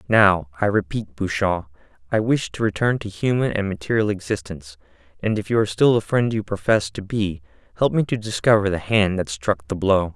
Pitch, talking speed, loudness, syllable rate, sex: 100 Hz, 200 wpm, -21 LUFS, 5.4 syllables/s, male